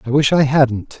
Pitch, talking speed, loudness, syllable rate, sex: 135 Hz, 240 wpm, -15 LUFS, 4.6 syllables/s, male